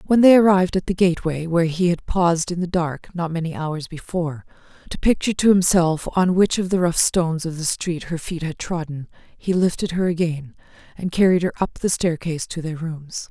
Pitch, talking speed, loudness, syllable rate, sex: 170 Hz, 210 wpm, -20 LUFS, 5.5 syllables/s, female